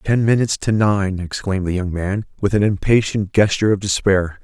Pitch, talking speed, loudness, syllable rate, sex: 100 Hz, 190 wpm, -18 LUFS, 5.5 syllables/s, male